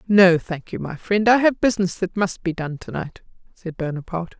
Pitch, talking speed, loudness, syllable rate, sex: 185 Hz, 205 wpm, -21 LUFS, 5.3 syllables/s, female